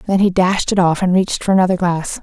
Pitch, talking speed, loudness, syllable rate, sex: 185 Hz, 270 wpm, -15 LUFS, 6.3 syllables/s, female